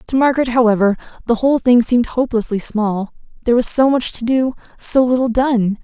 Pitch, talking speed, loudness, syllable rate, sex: 240 Hz, 185 wpm, -16 LUFS, 6.1 syllables/s, female